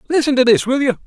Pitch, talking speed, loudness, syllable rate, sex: 250 Hz, 280 wpm, -15 LUFS, 7.1 syllables/s, male